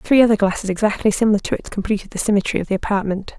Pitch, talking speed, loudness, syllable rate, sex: 205 Hz, 230 wpm, -19 LUFS, 7.5 syllables/s, female